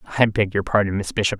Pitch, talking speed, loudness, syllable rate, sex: 100 Hz, 255 wpm, -20 LUFS, 7.6 syllables/s, male